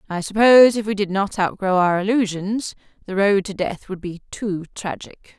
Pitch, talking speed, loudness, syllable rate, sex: 195 Hz, 190 wpm, -19 LUFS, 4.9 syllables/s, female